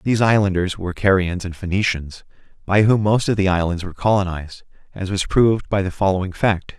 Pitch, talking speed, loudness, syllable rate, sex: 95 Hz, 185 wpm, -19 LUFS, 5.9 syllables/s, male